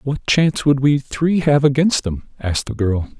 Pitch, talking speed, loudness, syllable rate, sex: 135 Hz, 205 wpm, -17 LUFS, 5.0 syllables/s, male